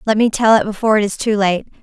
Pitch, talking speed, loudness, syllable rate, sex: 210 Hz, 295 wpm, -15 LUFS, 7.1 syllables/s, female